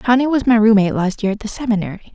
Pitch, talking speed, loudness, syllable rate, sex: 220 Hz, 250 wpm, -16 LUFS, 7.5 syllables/s, female